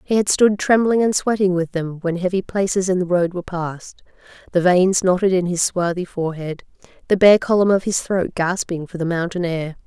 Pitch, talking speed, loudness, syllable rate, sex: 180 Hz, 205 wpm, -19 LUFS, 5.3 syllables/s, female